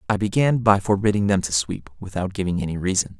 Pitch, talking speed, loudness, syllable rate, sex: 100 Hz, 205 wpm, -22 LUFS, 6.2 syllables/s, male